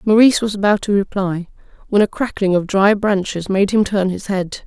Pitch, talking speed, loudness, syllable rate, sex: 200 Hz, 205 wpm, -17 LUFS, 5.3 syllables/s, female